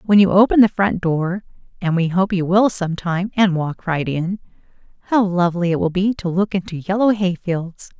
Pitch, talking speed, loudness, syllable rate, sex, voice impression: 185 Hz, 195 wpm, -18 LUFS, 4.9 syllables/s, female, feminine, adult-like, slightly soft, calm, friendly, slightly elegant, slightly sweet, slightly kind